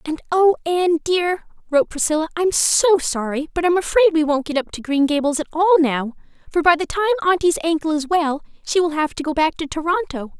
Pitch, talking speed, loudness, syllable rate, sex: 325 Hz, 220 wpm, -19 LUFS, 5.6 syllables/s, female